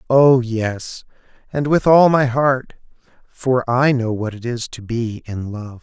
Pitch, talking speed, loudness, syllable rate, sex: 120 Hz, 175 wpm, -18 LUFS, 3.7 syllables/s, male